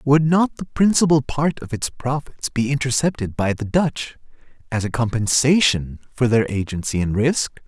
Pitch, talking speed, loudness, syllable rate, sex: 130 Hz, 165 wpm, -20 LUFS, 4.7 syllables/s, male